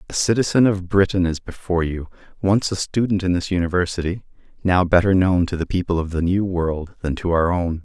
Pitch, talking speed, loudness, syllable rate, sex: 90 Hz, 205 wpm, -20 LUFS, 5.7 syllables/s, male